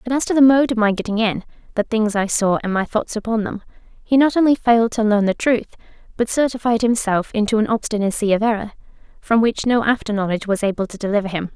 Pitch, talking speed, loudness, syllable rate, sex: 220 Hz, 230 wpm, -18 LUFS, 6.3 syllables/s, female